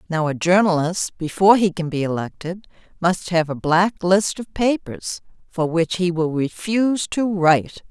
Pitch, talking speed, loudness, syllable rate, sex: 180 Hz, 165 wpm, -20 LUFS, 4.5 syllables/s, female